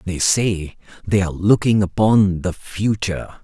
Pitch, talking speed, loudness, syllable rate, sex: 95 Hz, 140 wpm, -18 LUFS, 4.3 syllables/s, male